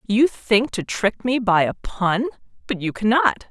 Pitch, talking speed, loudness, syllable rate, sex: 210 Hz, 190 wpm, -20 LUFS, 4.1 syllables/s, female